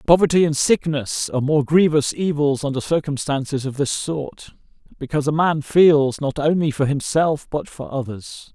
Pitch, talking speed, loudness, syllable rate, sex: 145 Hz, 160 wpm, -19 LUFS, 4.9 syllables/s, male